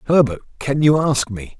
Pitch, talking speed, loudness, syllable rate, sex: 130 Hz, 190 wpm, -18 LUFS, 4.8 syllables/s, male